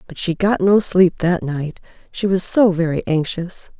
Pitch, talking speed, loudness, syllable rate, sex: 180 Hz, 190 wpm, -17 LUFS, 4.2 syllables/s, female